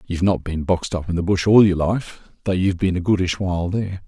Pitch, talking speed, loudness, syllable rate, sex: 90 Hz, 265 wpm, -20 LUFS, 6.3 syllables/s, male